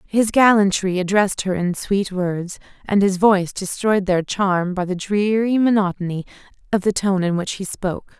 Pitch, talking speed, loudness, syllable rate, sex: 195 Hz, 175 wpm, -19 LUFS, 4.8 syllables/s, female